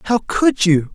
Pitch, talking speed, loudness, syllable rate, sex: 205 Hz, 190 wpm, -16 LUFS, 3.9 syllables/s, male